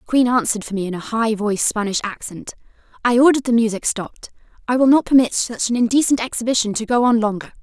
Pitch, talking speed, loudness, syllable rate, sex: 230 Hz, 220 wpm, -18 LUFS, 6.8 syllables/s, female